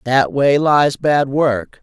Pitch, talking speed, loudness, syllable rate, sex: 145 Hz, 165 wpm, -15 LUFS, 2.9 syllables/s, female